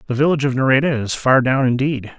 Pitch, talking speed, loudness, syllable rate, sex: 130 Hz, 220 wpm, -17 LUFS, 6.5 syllables/s, male